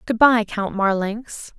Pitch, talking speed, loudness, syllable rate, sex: 215 Hz, 150 wpm, -19 LUFS, 3.6 syllables/s, female